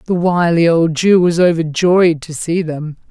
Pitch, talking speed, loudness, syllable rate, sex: 170 Hz, 175 wpm, -14 LUFS, 3.9 syllables/s, female